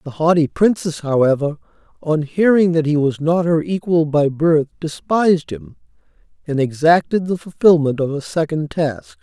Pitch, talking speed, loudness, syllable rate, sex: 160 Hz, 155 wpm, -17 LUFS, 4.7 syllables/s, male